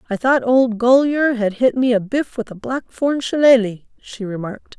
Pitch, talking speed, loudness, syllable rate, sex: 240 Hz, 190 wpm, -17 LUFS, 4.8 syllables/s, female